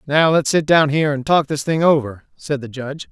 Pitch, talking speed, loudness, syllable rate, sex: 145 Hz, 250 wpm, -17 LUFS, 5.6 syllables/s, male